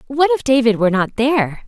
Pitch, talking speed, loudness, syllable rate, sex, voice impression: 250 Hz, 215 wpm, -16 LUFS, 6.0 syllables/s, female, feminine, slightly adult-like, clear, slightly cute, friendly, slightly kind